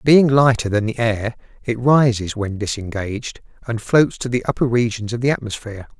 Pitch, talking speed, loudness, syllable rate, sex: 115 Hz, 180 wpm, -19 LUFS, 5.3 syllables/s, male